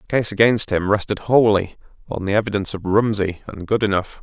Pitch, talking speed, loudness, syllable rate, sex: 105 Hz, 185 wpm, -19 LUFS, 6.0 syllables/s, male